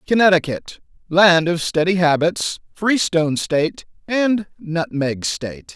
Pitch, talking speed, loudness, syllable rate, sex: 175 Hz, 105 wpm, -18 LUFS, 4.1 syllables/s, male